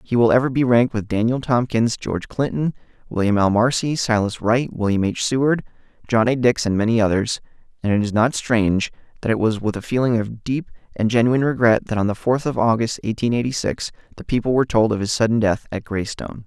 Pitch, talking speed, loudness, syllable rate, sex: 115 Hz, 215 wpm, -20 LUFS, 6.0 syllables/s, male